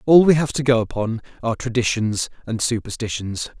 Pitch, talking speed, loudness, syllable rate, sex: 120 Hz, 165 wpm, -21 LUFS, 5.7 syllables/s, male